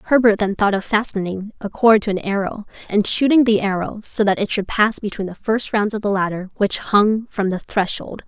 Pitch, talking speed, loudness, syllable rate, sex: 205 Hz, 225 wpm, -19 LUFS, 5.2 syllables/s, female